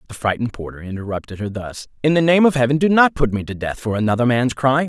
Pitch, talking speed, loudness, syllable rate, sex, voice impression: 125 Hz, 260 wpm, -18 LUFS, 6.8 syllables/s, male, very masculine, very middle-aged, very thick, tensed, powerful, slightly dark, slightly hard, muffled, fluent, slightly raspy, cool, intellectual, slightly refreshing, sincere, calm, mature, very friendly, very reassuring, unique, slightly elegant, wild, sweet, lively, strict, slightly intense, slightly modest